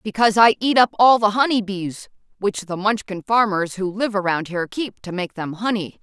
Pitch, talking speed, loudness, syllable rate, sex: 205 Hz, 210 wpm, -20 LUFS, 5.2 syllables/s, female